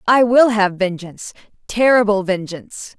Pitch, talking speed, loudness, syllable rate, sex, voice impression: 210 Hz, 100 wpm, -15 LUFS, 4.8 syllables/s, female, very feminine, slightly middle-aged, slightly thin, tensed, powerful, slightly dark, slightly hard, clear, slightly fluent, slightly cool, intellectual, slightly refreshing, sincere, slightly calm, slightly friendly, slightly reassuring, slightly unique, slightly wild, slightly sweet, slightly lively, slightly strict, slightly intense